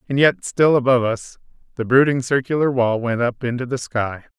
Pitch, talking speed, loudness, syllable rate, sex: 125 Hz, 190 wpm, -19 LUFS, 5.3 syllables/s, male